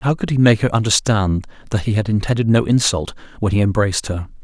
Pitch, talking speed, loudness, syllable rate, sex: 105 Hz, 215 wpm, -17 LUFS, 6.1 syllables/s, male